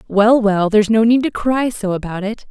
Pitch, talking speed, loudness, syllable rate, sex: 215 Hz, 240 wpm, -15 LUFS, 5.1 syllables/s, female